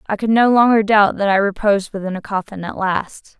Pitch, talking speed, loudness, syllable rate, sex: 205 Hz, 230 wpm, -16 LUFS, 5.6 syllables/s, female